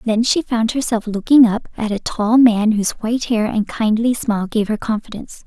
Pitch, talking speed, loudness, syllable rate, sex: 225 Hz, 210 wpm, -17 LUFS, 5.4 syllables/s, female